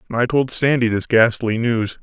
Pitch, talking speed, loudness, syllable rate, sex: 120 Hz, 180 wpm, -18 LUFS, 4.5 syllables/s, male